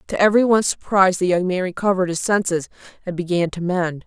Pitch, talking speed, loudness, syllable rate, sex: 185 Hz, 190 wpm, -19 LUFS, 6.7 syllables/s, female